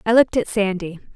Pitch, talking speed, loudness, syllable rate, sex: 205 Hz, 205 wpm, -19 LUFS, 6.7 syllables/s, female